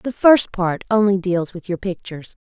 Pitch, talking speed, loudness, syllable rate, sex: 190 Hz, 195 wpm, -18 LUFS, 4.9 syllables/s, female